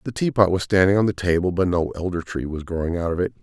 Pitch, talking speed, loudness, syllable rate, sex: 90 Hz, 295 wpm, -21 LUFS, 6.5 syllables/s, male